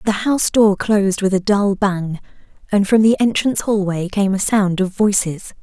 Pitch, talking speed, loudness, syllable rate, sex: 200 Hz, 190 wpm, -17 LUFS, 4.9 syllables/s, female